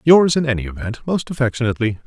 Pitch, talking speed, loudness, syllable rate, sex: 130 Hz, 175 wpm, -19 LUFS, 7.0 syllables/s, male